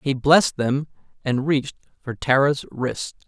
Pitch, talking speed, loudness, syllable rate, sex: 135 Hz, 145 wpm, -21 LUFS, 4.5 syllables/s, male